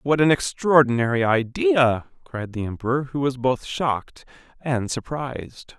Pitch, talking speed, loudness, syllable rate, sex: 135 Hz, 135 wpm, -22 LUFS, 4.4 syllables/s, male